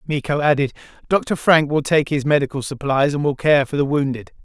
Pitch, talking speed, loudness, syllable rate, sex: 145 Hz, 205 wpm, -19 LUFS, 5.5 syllables/s, male